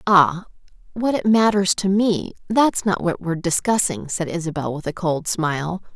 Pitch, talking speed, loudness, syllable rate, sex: 185 Hz, 160 wpm, -20 LUFS, 4.8 syllables/s, female